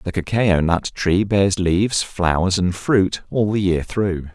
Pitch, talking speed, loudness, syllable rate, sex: 95 Hz, 180 wpm, -19 LUFS, 3.8 syllables/s, male